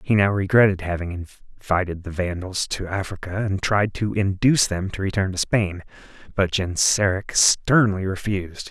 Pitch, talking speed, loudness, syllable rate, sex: 95 Hz, 150 wpm, -21 LUFS, 5.0 syllables/s, male